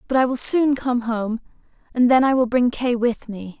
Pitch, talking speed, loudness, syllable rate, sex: 245 Hz, 235 wpm, -19 LUFS, 4.8 syllables/s, female